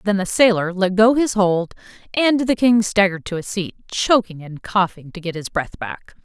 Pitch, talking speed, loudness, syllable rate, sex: 195 Hz, 210 wpm, -18 LUFS, 4.9 syllables/s, female